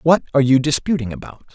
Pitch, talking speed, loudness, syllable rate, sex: 140 Hz, 195 wpm, -17 LUFS, 6.8 syllables/s, male